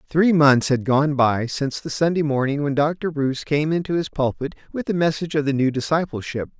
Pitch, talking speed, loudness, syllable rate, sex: 145 Hz, 210 wpm, -21 LUFS, 5.6 syllables/s, male